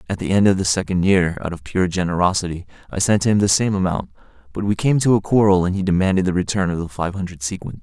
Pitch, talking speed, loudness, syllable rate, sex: 95 Hz, 255 wpm, -19 LUFS, 6.5 syllables/s, male